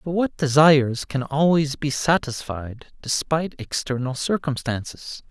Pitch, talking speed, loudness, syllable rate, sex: 145 Hz, 115 wpm, -22 LUFS, 4.5 syllables/s, male